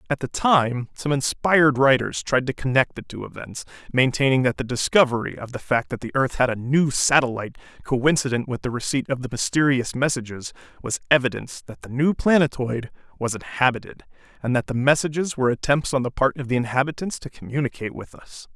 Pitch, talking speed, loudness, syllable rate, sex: 130 Hz, 190 wpm, -22 LUFS, 5.8 syllables/s, male